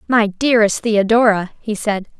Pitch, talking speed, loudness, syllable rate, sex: 215 Hz, 135 wpm, -16 LUFS, 4.9 syllables/s, female